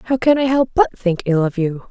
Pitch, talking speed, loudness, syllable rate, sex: 220 Hz, 285 wpm, -17 LUFS, 5.7 syllables/s, female